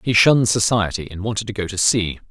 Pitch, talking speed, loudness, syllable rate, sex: 100 Hz, 235 wpm, -18 LUFS, 6.1 syllables/s, male